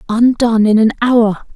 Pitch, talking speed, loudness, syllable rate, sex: 225 Hz, 155 wpm, -12 LUFS, 4.8 syllables/s, female